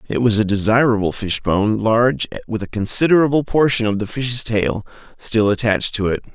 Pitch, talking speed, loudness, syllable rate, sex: 115 Hz, 170 wpm, -17 LUFS, 5.6 syllables/s, male